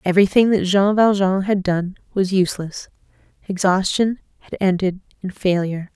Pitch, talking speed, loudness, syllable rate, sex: 190 Hz, 130 wpm, -19 LUFS, 5.2 syllables/s, female